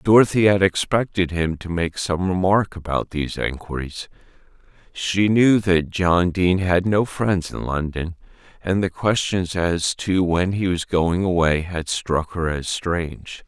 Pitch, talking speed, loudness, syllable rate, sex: 90 Hz, 160 wpm, -21 LUFS, 4.1 syllables/s, male